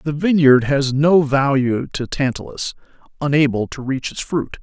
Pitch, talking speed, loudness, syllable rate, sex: 140 Hz, 155 wpm, -18 LUFS, 4.5 syllables/s, male